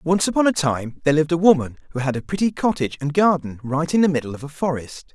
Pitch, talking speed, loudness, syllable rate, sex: 155 Hz, 255 wpm, -20 LUFS, 6.7 syllables/s, male